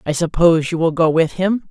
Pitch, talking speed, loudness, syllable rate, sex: 165 Hz, 245 wpm, -16 LUFS, 5.7 syllables/s, female